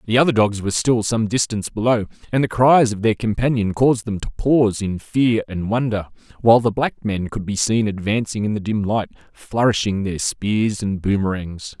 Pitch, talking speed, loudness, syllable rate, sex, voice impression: 110 Hz, 200 wpm, -19 LUFS, 5.3 syllables/s, male, masculine, adult-like, tensed, slightly powerful, hard, clear, slightly raspy, cool, slightly mature, friendly, wild, lively, slightly sharp